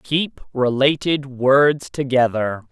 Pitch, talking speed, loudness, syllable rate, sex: 135 Hz, 90 wpm, -18 LUFS, 3.3 syllables/s, male